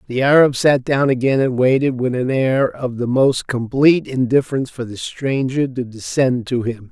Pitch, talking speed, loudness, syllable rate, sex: 130 Hz, 190 wpm, -17 LUFS, 4.9 syllables/s, male